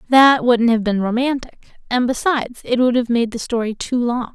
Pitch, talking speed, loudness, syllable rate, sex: 240 Hz, 205 wpm, -18 LUFS, 5.0 syllables/s, female